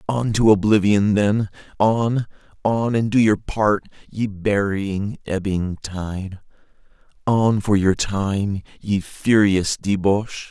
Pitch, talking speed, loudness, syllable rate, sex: 100 Hz, 120 wpm, -20 LUFS, 3.4 syllables/s, male